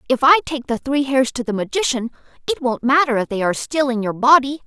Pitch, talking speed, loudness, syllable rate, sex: 260 Hz, 245 wpm, -18 LUFS, 6.2 syllables/s, female